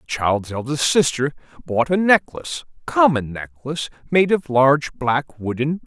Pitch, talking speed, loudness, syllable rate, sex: 140 Hz, 135 wpm, -19 LUFS, 4.6 syllables/s, male